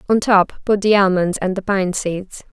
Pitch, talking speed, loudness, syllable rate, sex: 195 Hz, 210 wpm, -17 LUFS, 4.5 syllables/s, female